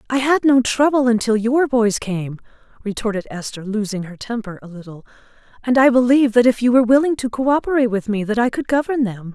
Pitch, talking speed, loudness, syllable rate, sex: 235 Hz, 205 wpm, -18 LUFS, 6.0 syllables/s, female